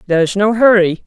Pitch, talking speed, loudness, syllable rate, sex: 200 Hz, 225 wpm, -12 LUFS, 6.6 syllables/s, female